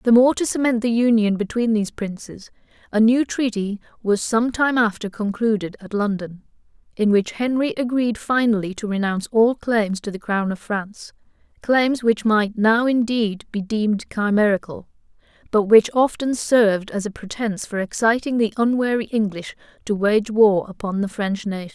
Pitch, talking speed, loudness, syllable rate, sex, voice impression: 220 Hz, 165 wpm, -20 LUFS, 4.9 syllables/s, female, very feminine, very young, thin, tensed, slightly powerful, slightly bright, slightly soft, clear, slightly fluent, cute, slightly cool, intellectual, very refreshing, sincere, calm, friendly, reassuring, unique, very elegant, very wild, sweet, lively, strict, slightly intense, sharp, slightly modest, light